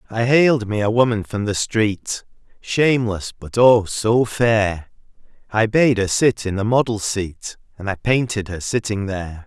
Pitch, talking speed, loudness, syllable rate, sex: 110 Hz, 170 wpm, -19 LUFS, 4.2 syllables/s, male